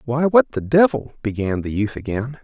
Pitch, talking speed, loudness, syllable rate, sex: 115 Hz, 195 wpm, -19 LUFS, 5.0 syllables/s, male